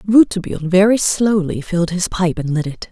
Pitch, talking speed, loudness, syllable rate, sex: 185 Hz, 185 wpm, -16 LUFS, 5.8 syllables/s, female